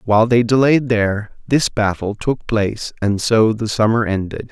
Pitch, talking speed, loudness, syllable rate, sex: 110 Hz, 175 wpm, -17 LUFS, 4.7 syllables/s, male